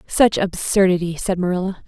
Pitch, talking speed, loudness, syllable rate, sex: 185 Hz, 130 wpm, -19 LUFS, 5.2 syllables/s, female